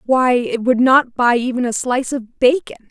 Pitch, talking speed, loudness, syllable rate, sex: 250 Hz, 205 wpm, -16 LUFS, 4.8 syllables/s, female